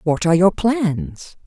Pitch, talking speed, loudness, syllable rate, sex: 170 Hz, 165 wpm, -17 LUFS, 3.9 syllables/s, female